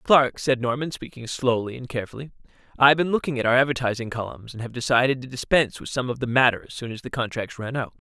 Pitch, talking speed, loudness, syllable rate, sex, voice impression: 125 Hz, 240 wpm, -23 LUFS, 6.7 syllables/s, male, masculine, adult-like, fluent, slightly refreshing, unique